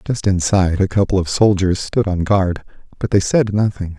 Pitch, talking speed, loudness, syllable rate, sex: 95 Hz, 195 wpm, -17 LUFS, 5.1 syllables/s, male